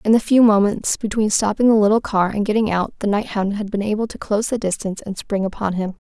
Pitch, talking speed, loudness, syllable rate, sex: 210 Hz, 245 wpm, -19 LUFS, 6.2 syllables/s, female